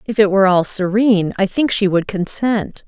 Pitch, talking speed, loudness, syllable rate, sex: 200 Hz, 210 wpm, -16 LUFS, 5.1 syllables/s, female